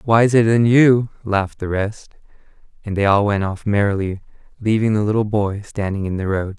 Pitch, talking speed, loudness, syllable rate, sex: 105 Hz, 180 wpm, -18 LUFS, 5.1 syllables/s, male